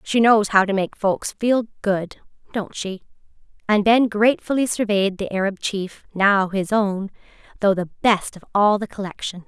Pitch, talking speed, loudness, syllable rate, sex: 205 Hz, 170 wpm, -20 LUFS, 4.6 syllables/s, female